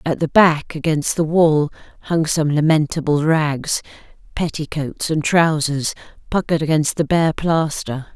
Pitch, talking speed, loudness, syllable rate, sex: 155 Hz, 130 wpm, -18 LUFS, 4.3 syllables/s, female